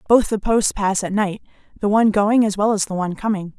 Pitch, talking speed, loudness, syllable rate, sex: 205 Hz, 250 wpm, -19 LUFS, 6.0 syllables/s, female